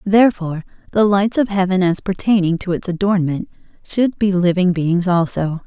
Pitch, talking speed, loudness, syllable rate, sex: 185 Hz, 160 wpm, -17 LUFS, 5.1 syllables/s, female